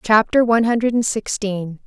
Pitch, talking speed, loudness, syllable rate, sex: 215 Hz, 130 wpm, -18 LUFS, 4.7 syllables/s, female